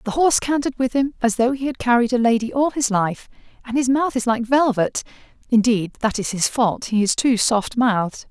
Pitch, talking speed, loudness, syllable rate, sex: 240 Hz, 215 wpm, -19 LUFS, 5.4 syllables/s, female